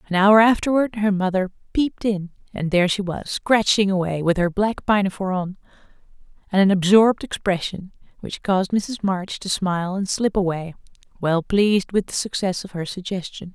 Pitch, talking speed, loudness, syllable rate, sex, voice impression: 195 Hz, 175 wpm, -21 LUFS, 5.4 syllables/s, female, very feminine, very adult-like, very thin, tensed, very powerful, bright, soft, very clear, fluent, cute, slightly cool, intellectual, refreshing, slightly sincere, calm, very friendly, very reassuring, unique, very elegant, slightly wild, very sweet, lively, kind, slightly modest, slightly light